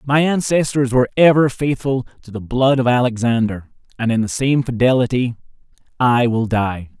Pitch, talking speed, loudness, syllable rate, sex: 125 Hz, 155 wpm, -17 LUFS, 5.1 syllables/s, male